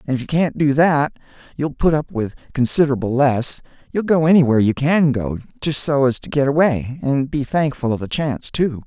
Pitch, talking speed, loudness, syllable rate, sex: 140 Hz, 210 wpm, -18 LUFS, 5.5 syllables/s, male